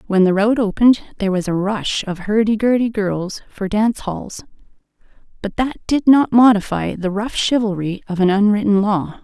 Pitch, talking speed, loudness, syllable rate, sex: 210 Hz, 175 wpm, -17 LUFS, 5.0 syllables/s, female